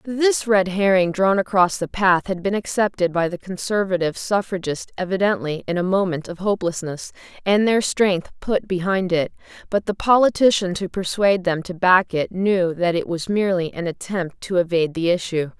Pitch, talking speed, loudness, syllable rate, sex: 185 Hz, 180 wpm, -20 LUFS, 5.1 syllables/s, female